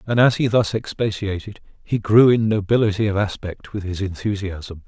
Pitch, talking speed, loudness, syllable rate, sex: 105 Hz, 170 wpm, -20 LUFS, 5.1 syllables/s, male